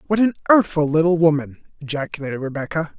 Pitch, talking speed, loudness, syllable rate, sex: 160 Hz, 140 wpm, -19 LUFS, 6.4 syllables/s, male